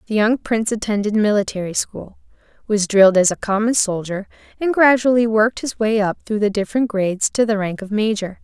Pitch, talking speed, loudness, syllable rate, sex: 210 Hz, 190 wpm, -18 LUFS, 5.8 syllables/s, female